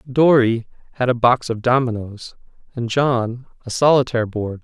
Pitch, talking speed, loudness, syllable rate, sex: 120 Hz, 140 wpm, -18 LUFS, 4.7 syllables/s, male